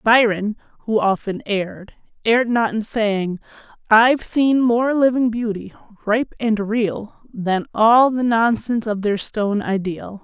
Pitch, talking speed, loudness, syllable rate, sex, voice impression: 220 Hz, 140 wpm, -19 LUFS, 4.1 syllables/s, female, very feminine, slightly gender-neutral, very adult-like, middle-aged, slightly thin, tensed, powerful, bright, hard, very clear, fluent, slightly cool, intellectual, very refreshing, very sincere, calm, friendly, reassuring, slightly unique, wild, lively, slightly kind, slightly intense, slightly sharp